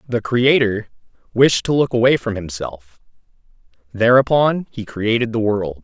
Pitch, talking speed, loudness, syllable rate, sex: 115 Hz, 125 wpm, -17 LUFS, 4.4 syllables/s, male